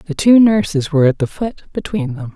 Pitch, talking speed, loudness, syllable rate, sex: 220 Hz, 230 wpm, -15 LUFS, 5.5 syllables/s, female